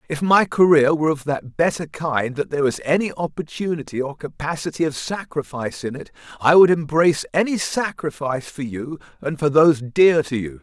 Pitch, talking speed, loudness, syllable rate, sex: 150 Hz, 180 wpm, -20 LUFS, 5.5 syllables/s, male